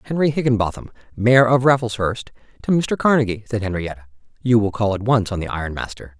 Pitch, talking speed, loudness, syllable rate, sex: 115 Hz, 185 wpm, -19 LUFS, 6.3 syllables/s, male